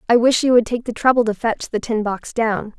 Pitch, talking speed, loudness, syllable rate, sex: 230 Hz, 280 wpm, -18 LUFS, 5.4 syllables/s, female